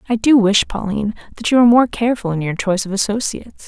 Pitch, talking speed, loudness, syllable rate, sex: 215 Hz, 230 wpm, -16 LUFS, 7.1 syllables/s, female